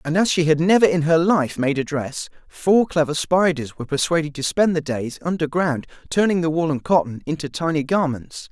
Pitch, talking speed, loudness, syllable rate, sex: 160 Hz, 205 wpm, -20 LUFS, 5.3 syllables/s, male